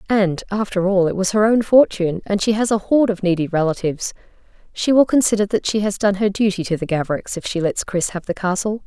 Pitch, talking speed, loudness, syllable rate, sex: 200 Hz, 235 wpm, -18 LUFS, 6.2 syllables/s, female